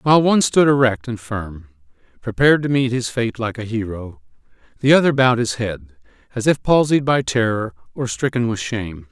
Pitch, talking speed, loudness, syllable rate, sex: 115 Hz, 185 wpm, -18 LUFS, 5.6 syllables/s, male